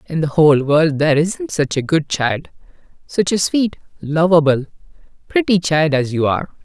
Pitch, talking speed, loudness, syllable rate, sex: 160 Hz, 170 wpm, -16 LUFS, 5.0 syllables/s, male